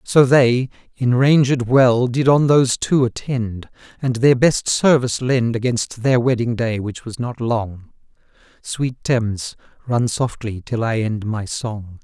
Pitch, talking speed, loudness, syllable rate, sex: 120 Hz, 155 wpm, -18 LUFS, 4.0 syllables/s, male